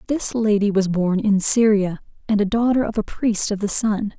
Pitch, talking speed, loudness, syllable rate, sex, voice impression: 210 Hz, 215 wpm, -19 LUFS, 4.9 syllables/s, female, feminine, slightly adult-like, slightly soft, slightly cute, slightly calm, slightly sweet